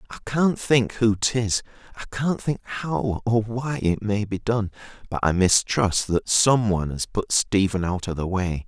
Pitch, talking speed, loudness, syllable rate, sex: 105 Hz, 195 wpm, -23 LUFS, 4.1 syllables/s, male